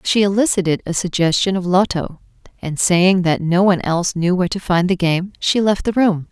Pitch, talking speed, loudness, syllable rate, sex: 180 Hz, 210 wpm, -17 LUFS, 5.4 syllables/s, female